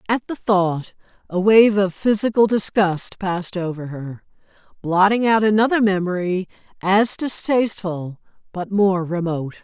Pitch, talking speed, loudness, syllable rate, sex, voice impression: 195 Hz, 125 wpm, -19 LUFS, 4.4 syllables/s, female, feminine, middle-aged, tensed, powerful, slightly hard, raspy, intellectual, elegant, lively, strict, intense, sharp